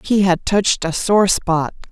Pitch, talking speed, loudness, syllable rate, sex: 185 Hz, 190 wpm, -16 LUFS, 4.2 syllables/s, female